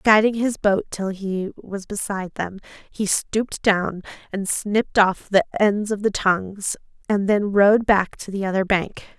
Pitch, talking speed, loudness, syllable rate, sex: 200 Hz, 175 wpm, -21 LUFS, 4.4 syllables/s, female